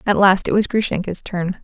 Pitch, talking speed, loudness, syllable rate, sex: 190 Hz, 220 wpm, -18 LUFS, 5.3 syllables/s, female